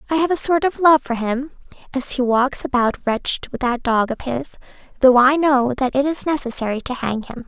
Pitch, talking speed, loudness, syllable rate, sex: 265 Hz, 225 wpm, -19 LUFS, 5.2 syllables/s, female